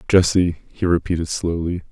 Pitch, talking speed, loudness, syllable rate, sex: 85 Hz, 125 wpm, -20 LUFS, 4.9 syllables/s, male